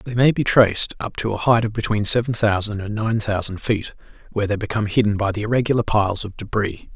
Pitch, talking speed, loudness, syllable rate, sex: 105 Hz, 225 wpm, -20 LUFS, 6.2 syllables/s, male